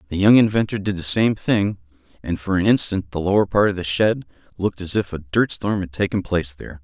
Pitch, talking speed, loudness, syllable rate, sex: 95 Hz, 230 wpm, -20 LUFS, 6.1 syllables/s, male